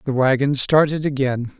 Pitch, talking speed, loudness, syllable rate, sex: 135 Hz, 150 wpm, -18 LUFS, 4.9 syllables/s, male